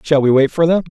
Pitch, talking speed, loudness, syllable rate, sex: 150 Hz, 315 wpm, -14 LUFS, 6.6 syllables/s, male